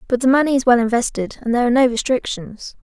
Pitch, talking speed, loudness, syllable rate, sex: 245 Hz, 230 wpm, -17 LUFS, 6.9 syllables/s, female